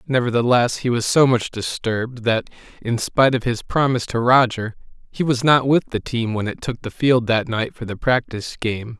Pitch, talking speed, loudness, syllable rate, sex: 120 Hz, 205 wpm, -19 LUFS, 5.2 syllables/s, male